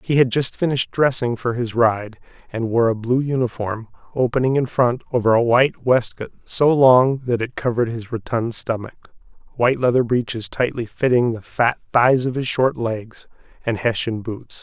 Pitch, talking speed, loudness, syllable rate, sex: 120 Hz, 175 wpm, -19 LUFS, 4.9 syllables/s, male